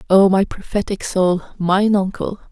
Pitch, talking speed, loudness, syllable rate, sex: 190 Hz, 145 wpm, -18 LUFS, 4.3 syllables/s, female